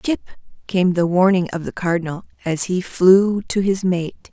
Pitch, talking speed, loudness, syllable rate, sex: 185 Hz, 180 wpm, -18 LUFS, 4.5 syllables/s, female